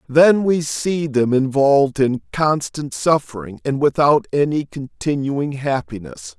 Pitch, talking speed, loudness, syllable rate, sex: 140 Hz, 120 wpm, -18 LUFS, 3.9 syllables/s, male